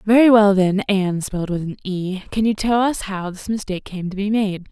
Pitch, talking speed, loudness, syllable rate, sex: 200 Hz, 240 wpm, -19 LUFS, 5.5 syllables/s, female